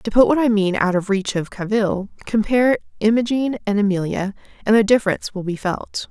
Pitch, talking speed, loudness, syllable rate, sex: 210 Hz, 195 wpm, -19 LUFS, 5.7 syllables/s, female